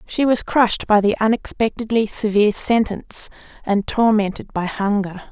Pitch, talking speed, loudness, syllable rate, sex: 215 Hz, 135 wpm, -19 LUFS, 5.1 syllables/s, female